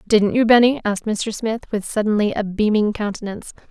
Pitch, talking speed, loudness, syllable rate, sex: 215 Hz, 180 wpm, -19 LUFS, 5.8 syllables/s, female